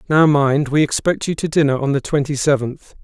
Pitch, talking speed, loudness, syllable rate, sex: 145 Hz, 220 wpm, -17 LUFS, 5.4 syllables/s, male